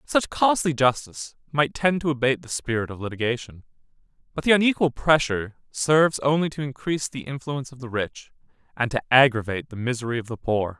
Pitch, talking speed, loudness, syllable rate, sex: 130 Hz, 180 wpm, -23 LUFS, 6.1 syllables/s, male